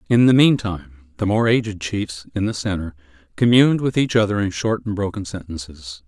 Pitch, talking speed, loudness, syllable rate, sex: 100 Hz, 190 wpm, -19 LUFS, 5.7 syllables/s, male